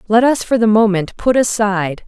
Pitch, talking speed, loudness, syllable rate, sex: 215 Hz, 200 wpm, -14 LUFS, 5.2 syllables/s, female